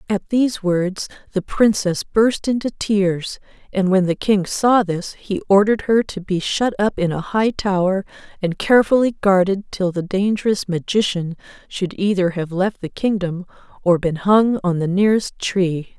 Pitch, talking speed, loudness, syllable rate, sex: 195 Hz, 170 wpm, -19 LUFS, 4.5 syllables/s, female